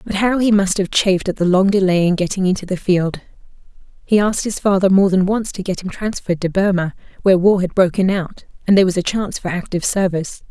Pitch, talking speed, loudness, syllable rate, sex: 190 Hz, 235 wpm, -17 LUFS, 6.4 syllables/s, female